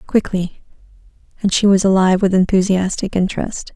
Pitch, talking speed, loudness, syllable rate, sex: 190 Hz, 130 wpm, -16 LUFS, 5.7 syllables/s, female